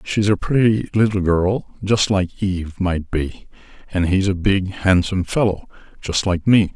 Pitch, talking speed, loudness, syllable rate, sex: 95 Hz, 150 wpm, -19 LUFS, 4.5 syllables/s, male